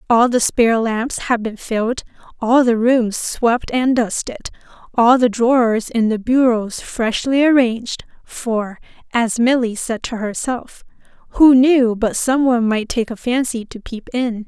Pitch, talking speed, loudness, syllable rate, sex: 235 Hz, 155 wpm, -17 LUFS, 4.2 syllables/s, female